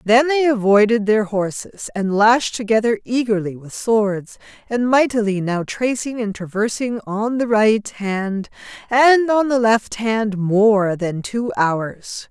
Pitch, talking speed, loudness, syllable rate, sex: 220 Hz, 145 wpm, -18 LUFS, 3.7 syllables/s, female